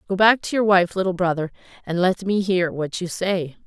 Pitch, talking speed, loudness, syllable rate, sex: 185 Hz, 230 wpm, -21 LUFS, 5.2 syllables/s, female